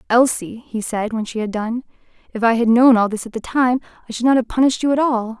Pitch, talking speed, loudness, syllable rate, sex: 235 Hz, 265 wpm, -18 LUFS, 6.1 syllables/s, female